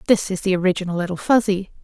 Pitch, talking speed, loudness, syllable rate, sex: 190 Hz, 195 wpm, -20 LUFS, 7.0 syllables/s, female